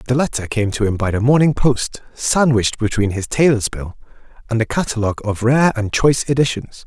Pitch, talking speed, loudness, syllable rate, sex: 120 Hz, 190 wpm, -17 LUFS, 5.6 syllables/s, male